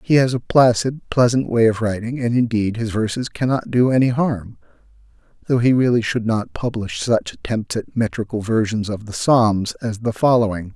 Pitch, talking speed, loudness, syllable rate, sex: 115 Hz, 185 wpm, -19 LUFS, 5.0 syllables/s, male